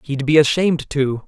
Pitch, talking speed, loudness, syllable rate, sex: 145 Hz, 190 wpm, -17 LUFS, 5.3 syllables/s, male